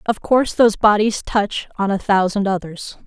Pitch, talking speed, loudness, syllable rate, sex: 205 Hz, 175 wpm, -17 LUFS, 5.0 syllables/s, female